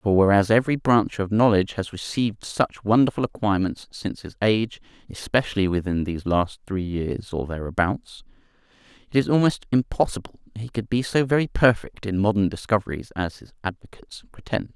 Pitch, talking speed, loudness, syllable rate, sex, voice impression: 105 Hz, 160 wpm, -23 LUFS, 5.7 syllables/s, male, very masculine, middle-aged, slightly thick, very tensed, powerful, bright, slightly dark, slightly soft, slightly muffled, fluent, cool, intellectual, refreshing, very sincere, very calm, mature, friendly, reassuring, slightly unique, elegant, wild, sweet, slightly lively, strict, slightly intense